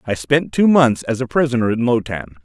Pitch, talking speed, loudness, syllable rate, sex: 125 Hz, 245 wpm, -17 LUFS, 5.6 syllables/s, male